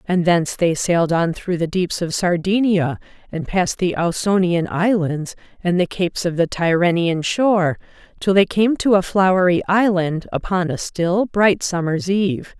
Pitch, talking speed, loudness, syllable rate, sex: 180 Hz, 165 wpm, -18 LUFS, 4.6 syllables/s, female